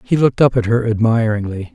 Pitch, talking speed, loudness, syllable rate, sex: 115 Hz, 205 wpm, -16 LUFS, 6.1 syllables/s, male